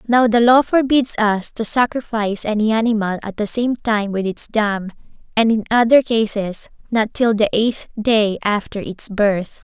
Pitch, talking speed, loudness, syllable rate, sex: 220 Hz, 175 wpm, -18 LUFS, 4.4 syllables/s, female